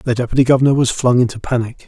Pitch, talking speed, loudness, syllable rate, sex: 125 Hz, 225 wpm, -15 LUFS, 7.1 syllables/s, male